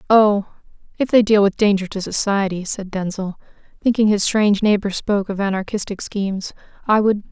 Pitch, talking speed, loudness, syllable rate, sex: 205 Hz, 165 wpm, -19 LUFS, 5.5 syllables/s, female